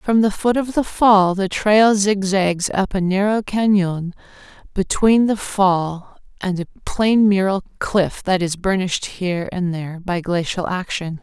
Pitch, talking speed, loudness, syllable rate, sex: 190 Hz, 160 wpm, -18 LUFS, 4.1 syllables/s, female